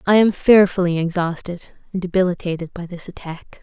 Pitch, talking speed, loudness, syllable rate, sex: 180 Hz, 150 wpm, -18 LUFS, 5.4 syllables/s, female